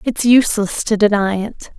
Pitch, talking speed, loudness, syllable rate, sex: 215 Hz, 170 wpm, -15 LUFS, 4.8 syllables/s, female